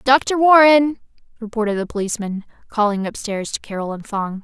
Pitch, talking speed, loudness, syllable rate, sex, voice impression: 225 Hz, 150 wpm, -18 LUFS, 5.4 syllables/s, female, feminine, slightly adult-like, slightly fluent, slightly cute, slightly intellectual